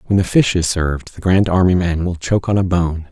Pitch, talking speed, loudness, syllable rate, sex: 90 Hz, 270 wpm, -16 LUFS, 5.8 syllables/s, male